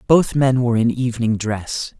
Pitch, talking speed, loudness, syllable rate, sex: 120 Hz, 180 wpm, -18 LUFS, 5.0 syllables/s, male